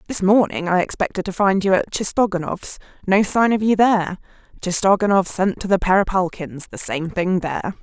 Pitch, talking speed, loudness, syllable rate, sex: 190 Hz, 160 wpm, -19 LUFS, 5.4 syllables/s, female